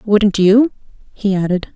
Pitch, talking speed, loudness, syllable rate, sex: 205 Hz, 135 wpm, -15 LUFS, 4.1 syllables/s, female